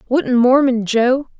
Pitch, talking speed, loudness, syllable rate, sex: 250 Hz, 130 wpm, -15 LUFS, 3.6 syllables/s, female